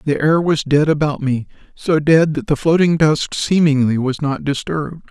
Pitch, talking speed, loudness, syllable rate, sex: 150 Hz, 190 wpm, -16 LUFS, 4.7 syllables/s, male